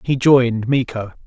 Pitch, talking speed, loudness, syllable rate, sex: 125 Hz, 140 wpm, -16 LUFS, 4.8 syllables/s, male